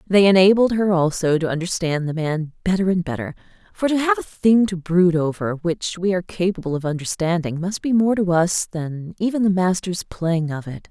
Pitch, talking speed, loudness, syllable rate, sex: 180 Hz, 205 wpm, -20 LUFS, 5.2 syllables/s, female